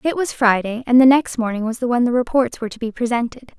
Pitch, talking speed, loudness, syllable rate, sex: 240 Hz, 270 wpm, -18 LUFS, 6.4 syllables/s, female